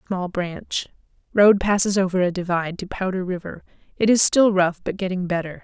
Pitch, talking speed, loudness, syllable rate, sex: 185 Hz, 170 wpm, -21 LUFS, 5.4 syllables/s, female